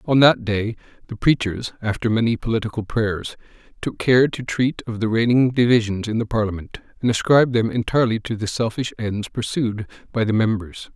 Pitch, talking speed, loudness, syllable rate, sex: 115 Hz, 175 wpm, -20 LUFS, 5.4 syllables/s, male